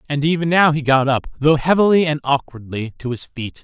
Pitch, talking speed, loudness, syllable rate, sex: 145 Hz, 215 wpm, -17 LUFS, 5.4 syllables/s, male